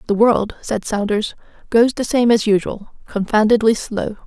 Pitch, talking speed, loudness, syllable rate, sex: 220 Hz, 155 wpm, -17 LUFS, 4.6 syllables/s, female